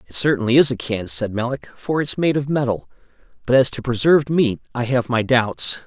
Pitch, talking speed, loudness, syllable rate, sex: 125 Hz, 215 wpm, -19 LUFS, 5.6 syllables/s, male